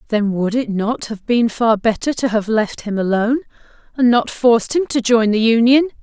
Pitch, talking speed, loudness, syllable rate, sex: 230 Hz, 210 wpm, -16 LUFS, 5.0 syllables/s, female